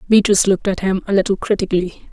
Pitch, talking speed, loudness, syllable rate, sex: 195 Hz, 200 wpm, -17 LUFS, 7.4 syllables/s, female